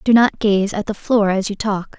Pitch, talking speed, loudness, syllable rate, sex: 205 Hz, 270 wpm, -18 LUFS, 4.8 syllables/s, female